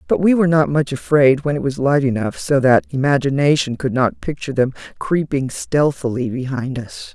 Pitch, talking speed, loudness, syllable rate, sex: 140 Hz, 185 wpm, -18 LUFS, 5.2 syllables/s, female